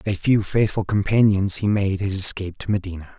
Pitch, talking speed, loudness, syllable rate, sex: 100 Hz, 205 wpm, -20 LUFS, 5.9 syllables/s, male